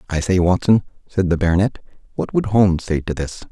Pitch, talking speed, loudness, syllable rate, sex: 90 Hz, 205 wpm, -18 LUFS, 6.0 syllables/s, male